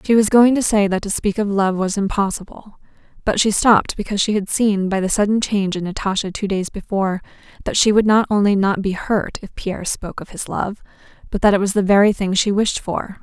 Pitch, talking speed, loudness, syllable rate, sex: 200 Hz, 235 wpm, -18 LUFS, 5.8 syllables/s, female